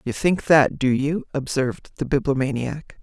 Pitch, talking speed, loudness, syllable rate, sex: 140 Hz, 160 wpm, -21 LUFS, 4.7 syllables/s, female